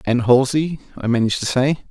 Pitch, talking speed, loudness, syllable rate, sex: 130 Hz, 190 wpm, -18 LUFS, 5.9 syllables/s, male